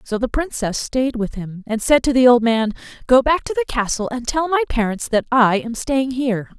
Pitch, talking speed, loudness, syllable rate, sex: 245 Hz, 235 wpm, -18 LUFS, 5.1 syllables/s, female